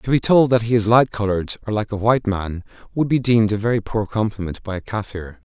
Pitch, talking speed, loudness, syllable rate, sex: 110 Hz, 250 wpm, -19 LUFS, 6.2 syllables/s, male